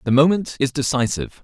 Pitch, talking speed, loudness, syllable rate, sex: 135 Hz, 165 wpm, -19 LUFS, 6.1 syllables/s, male